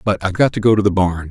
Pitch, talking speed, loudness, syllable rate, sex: 100 Hz, 370 wpm, -16 LUFS, 7.4 syllables/s, male